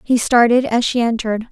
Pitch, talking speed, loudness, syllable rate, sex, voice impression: 235 Hz, 200 wpm, -15 LUFS, 5.8 syllables/s, female, feminine, slightly young, tensed, powerful, slightly soft, clear, fluent, intellectual, friendly, elegant, slightly kind, slightly modest